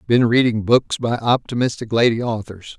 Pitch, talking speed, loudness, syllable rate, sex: 115 Hz, 150 wpm, -18 LUFS, 5.0 syllables/s, male